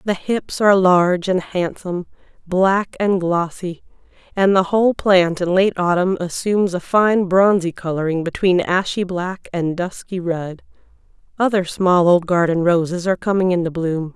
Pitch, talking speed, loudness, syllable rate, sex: 180 Hz, 155 wpm, -18 LUFS, 4.6 syllables/s, female